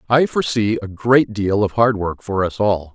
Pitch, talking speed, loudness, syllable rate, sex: 105 Hz, 225 wpm, -18 LUFS, 4.8 syllables/s, male